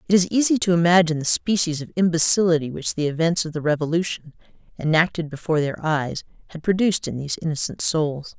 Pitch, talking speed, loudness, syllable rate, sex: 165 Hz, 180 wpm, -21 LUFS, 6.3 syllables/s, female